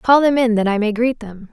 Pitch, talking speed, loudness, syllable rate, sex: 230 Hz, 315 wpm, -16 LUFS, 5.4 syllables/s, female